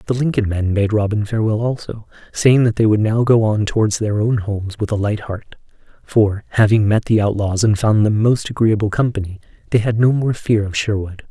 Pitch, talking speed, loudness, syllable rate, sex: 110 Hz, 210 wpm, -17 LUFS, 5.4 syllables/s, male